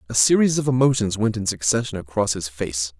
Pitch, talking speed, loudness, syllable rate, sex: 105 Hz, 200 wpm, -21 LUFS, 5.8 syllables/s, male